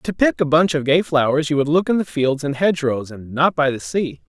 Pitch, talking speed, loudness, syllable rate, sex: 145 Hz, 290 wpm, -19 LUFS, 5.5 syllables/s, male